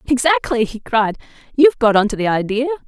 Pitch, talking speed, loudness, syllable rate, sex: 240 Hz, 165 wpm, -16 LUFS, 6.0 syllables/s, female